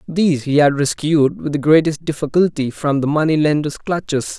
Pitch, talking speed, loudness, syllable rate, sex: 150 Hz, 180 wpm, -17 LUFS, 5.2 syllables/s, male